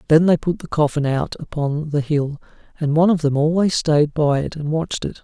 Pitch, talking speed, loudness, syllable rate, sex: 155 Hz, 230 wpm, -19 LUFS, 5.4 syllables/s, male